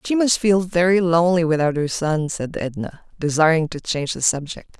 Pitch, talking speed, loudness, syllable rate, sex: 165 Hz, 190 wpm, -19 LUFS, 5.3 syllables/s, female